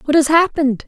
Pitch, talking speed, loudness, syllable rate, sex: 295 Hz, 205 wpm, -15 LUFS, 6.9 syllables/s, female